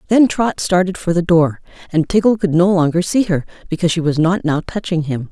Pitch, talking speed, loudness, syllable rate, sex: 175 Hz, 225 wpm, -16 LUFS, 5.6 syllables/s, female